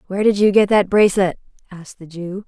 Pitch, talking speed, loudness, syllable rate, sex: 195 Hz, 220 wpm, -15 LUFS, 6.6 syllables/s, female